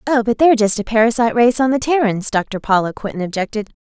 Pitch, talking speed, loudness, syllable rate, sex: 225 Hz, 220 wpm, -16 LUFS, 6.4 syllables/s, female